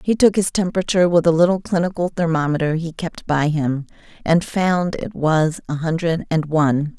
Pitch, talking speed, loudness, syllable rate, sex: 165 Hz, 180 wpm, -19 LUFS, 5.2 syllables/s, female